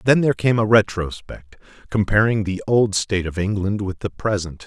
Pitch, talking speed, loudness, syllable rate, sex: 100 Hz, 180 wpm, -20 LUFS, 5.3 syllables/s, male